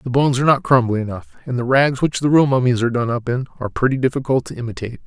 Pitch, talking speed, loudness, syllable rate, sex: 125 Hz, 260 wpm, -18 LUFS, 7.3 syllables/s, male